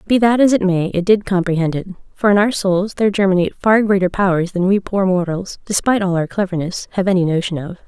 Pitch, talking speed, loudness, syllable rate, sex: 190 Hz, 230 wpm, -16 LUFS, 6.2 syllables/s, female